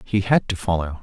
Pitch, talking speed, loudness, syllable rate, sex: 100 Hz, 235 wpm, -21 LUFS, 5.4 syllables/s, male